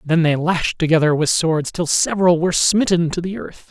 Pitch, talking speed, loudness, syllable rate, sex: 165 Hz, 210 wpm, -17 LUFS, 5.3 syllables/s, male